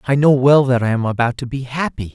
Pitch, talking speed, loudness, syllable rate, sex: 130 Hz, 280 wpm, -16 LUFS, 6.0 syllables/s, male